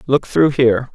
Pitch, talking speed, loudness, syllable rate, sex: 130 Hz, 190 wpm, -15 LUFS, 5.0 syllables/s, male